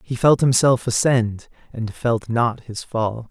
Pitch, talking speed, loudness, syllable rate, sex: 120 Hz, 165 wpm, -20 LUFS, 3.7 syllables/s, male